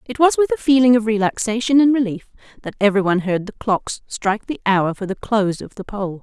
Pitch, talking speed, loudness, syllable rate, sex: 220 Hz, 230 wpm, -18 LUFS, 6.1 syllables/s, female